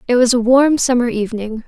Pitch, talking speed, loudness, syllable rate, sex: 240 Hz, 215 wpm, -15 LUFS, 6.0 syllables/s, female